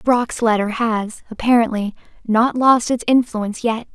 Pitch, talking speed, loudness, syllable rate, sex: 230 Hz, 135 wpm, -18 LUFS, 4.4 syllables/s, female